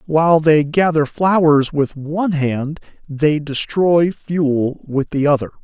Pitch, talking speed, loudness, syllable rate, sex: 155 Hz, 140 wpm, -16 LUFS, 3.7 syllables/s, male